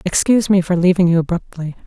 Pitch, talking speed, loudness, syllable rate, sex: 180 Hz, 195 wpm, -15 LUFS, 6.6 syllables/s, female